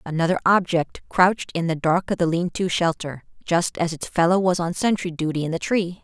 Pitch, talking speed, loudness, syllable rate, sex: 170 Hz, 220 wpm, -22 LUFS, 5.3 syllables/s, female